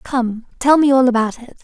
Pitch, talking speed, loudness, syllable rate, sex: 250 Hz, 220 wpm, -16 LUFS, 5.1 syllables/s, female